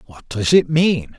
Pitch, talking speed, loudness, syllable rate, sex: 135 Hz, 200 wpm, -16 LUFS, 3.9 syllables/s, male